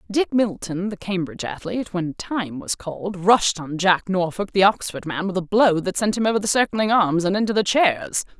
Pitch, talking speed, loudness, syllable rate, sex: 190 Hz, 215 wpm, -21 LUFS, 5.1 syllables/s, female